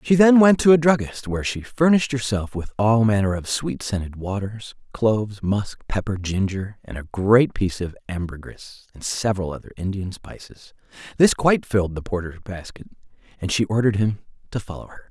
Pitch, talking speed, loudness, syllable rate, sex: 110 Hz, 180 wpm, -21 LUFS, 5.5 syllables/s, male